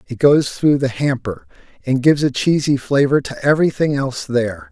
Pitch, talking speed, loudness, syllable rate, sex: 130 Hz, 180 wpm, -17 LUFS, 5.5 syllables/s, male